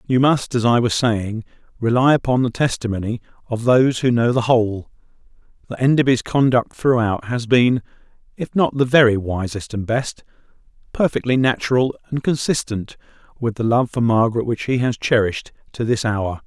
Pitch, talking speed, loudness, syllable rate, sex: 120 Hz, 165 wpm, -19 LUFS, 5.2 syllables/s, male